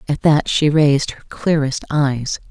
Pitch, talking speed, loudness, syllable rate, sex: 145 Hz, 170 wpm, -17 LUFS, 4.2 syllables/s, female